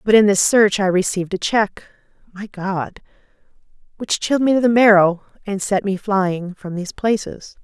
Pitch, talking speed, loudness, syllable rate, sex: 200 Hz, 180 wpm, -18 LUFS, 4.9 syllables/s, female